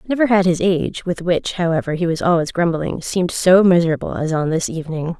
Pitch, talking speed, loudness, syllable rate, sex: 170 Hz, 210 wpm, -18 LUFS, 6.0 syllables/s, female